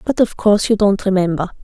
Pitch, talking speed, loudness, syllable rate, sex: 200 Hz, 220 wpm, -15 LUFS, 6.1 syllables/s, female